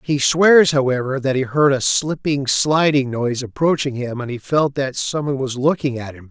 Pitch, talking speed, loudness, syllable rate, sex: 135 Hz, 210 wpm, -18 LUFS, 5.0 syllables/s, male